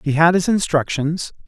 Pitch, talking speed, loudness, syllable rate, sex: 160 Hz, 160 wpm, -18 LUFS, 4.8 syllables/s, male